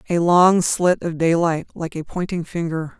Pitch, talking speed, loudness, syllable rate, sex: 170 Hz, 180 wpm, -19 LUFS, 4.4 syllables/s, female